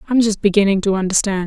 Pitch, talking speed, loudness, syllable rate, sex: 200 Hz, 245 wpm, -16 LUFS, 7.6 syllables/s, female